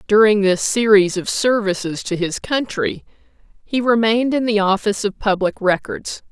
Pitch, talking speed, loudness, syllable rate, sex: 210 Hz, 150 wpm, -18 LUFS, 4.9 syllables/s, female